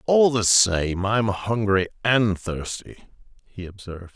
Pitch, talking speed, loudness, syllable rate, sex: 105 Hz, 130 wpm, -21 LUFS, 3.8 syllables/s, male